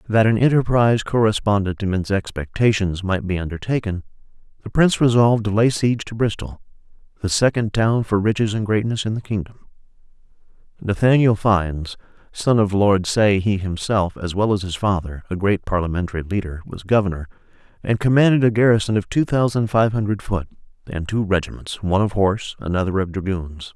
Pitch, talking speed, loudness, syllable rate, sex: 105 Hz, 165 wpm, -20 LUFS, 5.7 syllables/s, male